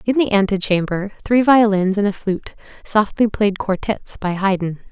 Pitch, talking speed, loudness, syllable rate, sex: 205 Hz, 160 wpm, -18 LUFS, 4.9 syllables/s, female